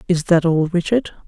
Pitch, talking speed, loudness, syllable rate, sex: 175 Hz, 190 wpm, -17 LUFS, 5.2 syllables/s, female